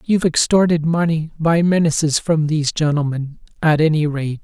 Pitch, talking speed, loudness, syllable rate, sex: 155 Hz, 150 wpm, -17 LUFS, 5.2 syllables/s, male